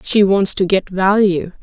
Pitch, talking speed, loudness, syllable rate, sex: 190 Hz, 185 wpm, -14 LUFS, 4.1 syllables/s, female